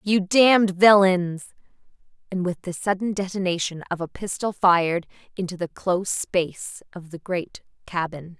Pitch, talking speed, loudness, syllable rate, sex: 185 Hz, 145 wpm, -22 LUFS, 4.7 syllables/s, female